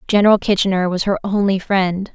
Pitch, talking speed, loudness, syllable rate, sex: 195 Hz, 170 wpm, -17 LUFS, 5.6 syllables/s, female